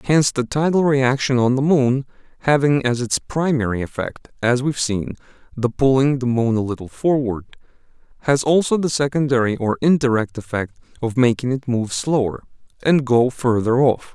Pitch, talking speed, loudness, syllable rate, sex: 130 Hz, 165 wpm, -19 LUFS, 5.1 syllables/s, male